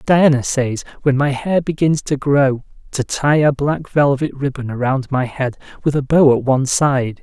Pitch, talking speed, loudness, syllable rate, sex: 140 Hz, 190 wpm, -17 LUFS, 4.5 syllables/s, male